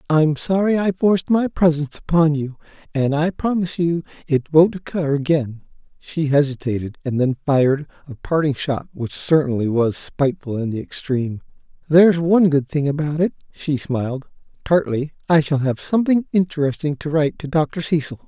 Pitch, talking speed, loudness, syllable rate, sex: 150 Hz, 165 wpm, -19 LUFS, 5.3 syllables/s, male